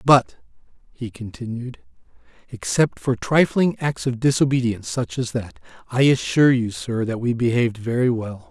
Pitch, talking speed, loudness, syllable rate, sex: 125 Hz, 150 wpm, -21 LUFS, 4.9 syllables/s, male